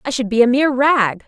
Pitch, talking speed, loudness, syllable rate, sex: 250 Hz, 280 wpm, -15 LUFS, 6.0 syllables/s, female